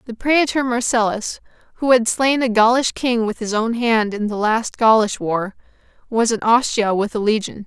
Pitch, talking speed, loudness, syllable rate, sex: 230 Hz, 190 wpm, -18 LUFS, 4.7 syllables/s, female